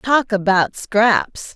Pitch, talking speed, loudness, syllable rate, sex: 215 Hz, 115 wpm, -17 LUFS, 2.7 syllables/s, female